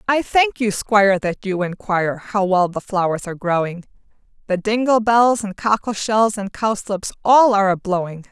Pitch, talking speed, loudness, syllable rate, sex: 205 Hz, 175 wpm, -18 LUFS, 4.7 syllables/s, female